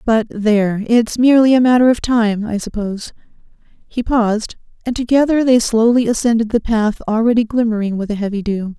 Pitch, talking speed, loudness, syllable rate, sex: 225 Hz, 170 wpm, -15 LUFS, 5.5 syllables/s, female